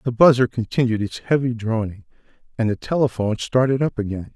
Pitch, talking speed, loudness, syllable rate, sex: 120 Hz, 165 wpm, -21 LUFS, 6.0 syllables/s, male